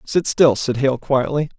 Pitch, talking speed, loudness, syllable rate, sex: 135 Hz, 190 wpm, -18 LUFS, 4.2 syllables/s, male